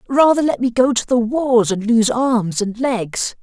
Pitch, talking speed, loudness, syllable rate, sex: 240 Hz, 210 wpm, -17 LUFS, 4.1 syllables/s, male